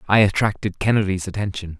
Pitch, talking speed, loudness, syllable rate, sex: 100 Hz, 135 wpm, -21 LUFS, 6.2 syllables/s, male